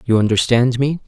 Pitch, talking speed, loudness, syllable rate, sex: 125 Hz, 165 wpm, -16 LUFS, 5.4 syllables/s, male